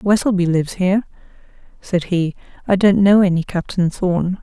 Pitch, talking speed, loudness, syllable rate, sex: 185 Hz, 150 wpm, -17 LUFS, 5.1 syllables/s, female